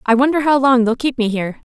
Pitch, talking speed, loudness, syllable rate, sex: 250 Hz, 280 wpm, -16 LUFS, 6.6 syllables/s, female